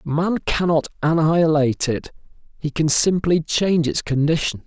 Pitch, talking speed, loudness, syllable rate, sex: 155 Hz, 130 wpm, -19 LUFS, 4.9 syllables/s, male